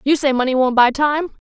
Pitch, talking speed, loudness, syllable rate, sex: 275 Hz, 240 wpm, -16 LUFS, 5.4 syllables/s, female